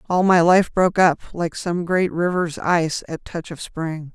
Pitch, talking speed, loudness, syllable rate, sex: 170 Hz, 205 wpm, -20 LUFS, 4.6 syllables/s, female